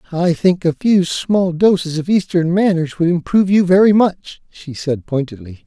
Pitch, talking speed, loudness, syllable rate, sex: 170 Hz, 180 wpm, -15 LUFS, 4.7 syllables/s, male